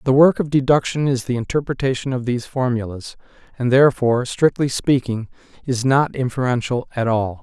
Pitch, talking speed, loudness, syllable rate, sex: 130 Hz, 155 wpm, -19 LUFS, 5.6 syllables/s, male